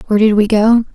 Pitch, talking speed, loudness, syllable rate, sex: 215 Hz, 255 wpm, -12 LUFS, 7.1 syllables/s, female